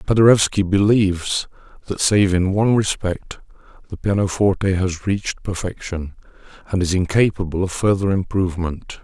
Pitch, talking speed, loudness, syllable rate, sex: 95 Hz, 120 wpm, -19 LUFS, 5.1 syllables/s, male